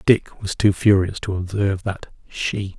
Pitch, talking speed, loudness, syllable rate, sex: 95 Hz, 170 wpm, -21 LUFS, 4.4 syllables/s, male